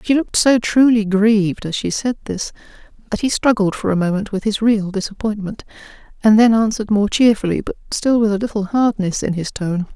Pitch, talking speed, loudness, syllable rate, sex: 210 Hz, 200 wpm, -17 LUFS, 5.6 syllables/s, female